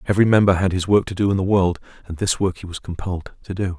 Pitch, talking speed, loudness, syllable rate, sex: 95 Hz, 285 wpm, -20 LUFS, 6.9 syllables/s, male